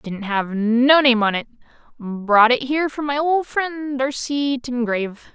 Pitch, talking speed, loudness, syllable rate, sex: 255 Hz, 170 wpm, -19 LUFS, 4.5 syllables/s, female